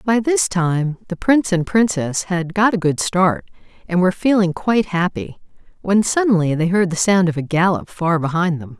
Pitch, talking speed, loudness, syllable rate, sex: 185 Hz, 200 wpm, -18 LUFS, 5.0 syllables/s, female